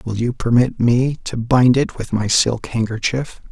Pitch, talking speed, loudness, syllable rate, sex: 120 Hz, 190 wpm, -18 LUFS, 4.2 syllables/s, male